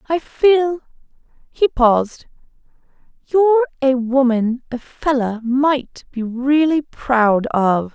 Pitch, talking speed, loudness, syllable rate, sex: 265 Hz, 90 wpm, -17 LUFS, 3.3 syllables/s, female